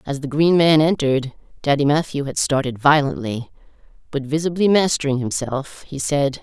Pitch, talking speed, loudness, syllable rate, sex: 145 Hz, 150 wpm, -19 LUFS, 5.1 syllables/s, female